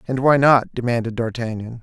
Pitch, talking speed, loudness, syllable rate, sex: 120 Hz, 165 wpm, -19 LUFS, 5.7 syllables/s, male